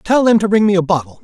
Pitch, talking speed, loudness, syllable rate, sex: 195 Hz, 340 wpm, -13 LUFS, 6.7 syllables/s, male